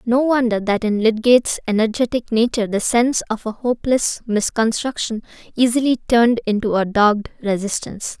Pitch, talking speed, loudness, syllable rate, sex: 230 Hz, 140 wpm, -18 LUFS, 5.6 syllables/s, female